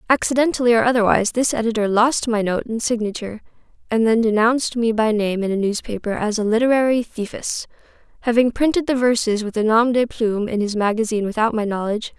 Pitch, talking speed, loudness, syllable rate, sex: 225 Hz, 185 wpm, -19 LUFS, 6.2 syllables/s, female